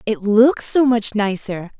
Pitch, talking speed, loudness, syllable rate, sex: 220 Hz, 170 wpm, -17 LUFS, 3.8 syllables/s, female